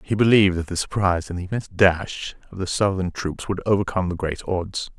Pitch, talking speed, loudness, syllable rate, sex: 95 Hz, 215 wpm, -22 LUFS, 6.2 syllables/s, male